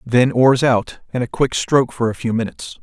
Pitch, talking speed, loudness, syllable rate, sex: 120 Hz, 235 wpm, -18 LUFS, 5.2 syllables/s, male